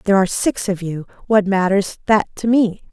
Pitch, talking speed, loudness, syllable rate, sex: 200 Hz, 205 wpm, -18 LUFS, 5.4 syllables/s, female